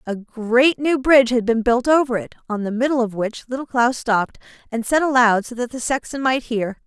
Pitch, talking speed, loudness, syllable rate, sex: 240 Hz, 225 wpm, -19 LUFS, 5.3 syllables/s, female